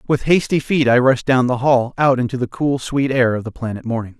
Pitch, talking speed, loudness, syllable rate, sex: 130 Hz, 260 wpm, -17 LUFS, 5.5 syllables/s, male